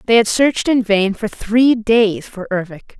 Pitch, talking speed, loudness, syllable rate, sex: 215 Hz, 200 wpm, -15 LUFS, 4.3 syllables/s, female